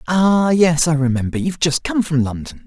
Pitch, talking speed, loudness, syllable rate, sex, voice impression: 155 Hz, 200 wpm, -17 LUFS, 5.2 syllables/s, male, masculine, middle-aged, tensed, powerful, clear, fluent, cool, intellectual, mature, slightly friendly, wild, lively, slightly intense